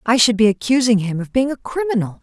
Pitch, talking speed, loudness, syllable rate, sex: 230 Hz, 240 wpm, -17 LUFS, 6.2 syllables/s, female